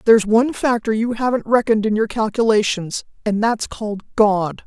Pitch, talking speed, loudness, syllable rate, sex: 220 Hz, 165 wpm, -18 LUFS, 5.3 syllables/s, female